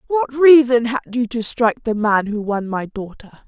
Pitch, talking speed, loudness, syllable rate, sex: 235 Hz, 205 wpm, -17 LUFS, 4.6 syllables/s, female